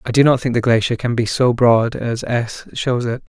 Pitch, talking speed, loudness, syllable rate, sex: 120 Hz, 250 wpm, -17 LUFS, 4.8 syllables/s, male